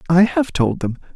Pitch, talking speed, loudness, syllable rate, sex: 160 Hz, 210 wpm, -18 LUFS, 4.9 syllables/s, male